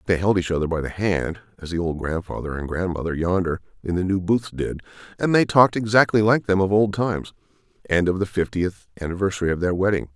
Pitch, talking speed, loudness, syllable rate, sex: 95 Hz, 225 wpm, -22 LUFS, 6.1 syllables/s, male